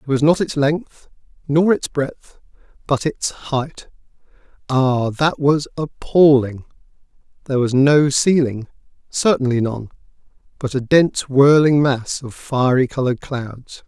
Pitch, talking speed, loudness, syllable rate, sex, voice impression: 140 Hz, 110 wpm, -17 LUFS, 4.0 syllables/s, male, masculine, adult-like, slightly thick, slightly refreshing, sincere, slightly calm